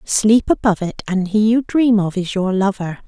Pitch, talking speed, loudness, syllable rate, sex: 205 Hz, 215 wpm, -17 LUFS, 4.9 syllables/s, female